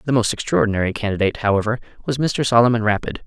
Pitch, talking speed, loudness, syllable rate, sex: 110 Hz, 165 wpm, -19 LUFS, 7.3 syllables/s, male